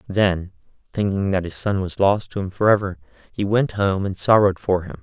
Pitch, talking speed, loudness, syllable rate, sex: 95 Hz, 215 wpm, -20 LUFS, 5.3 syllables/s, male